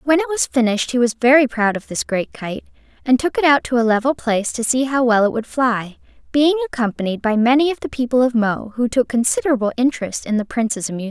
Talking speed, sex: 240 wpm, female